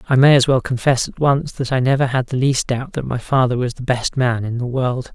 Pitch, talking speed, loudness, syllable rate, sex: 130 Hz, 280 wpm, -18 LUFS, 5.4 syllables/s, male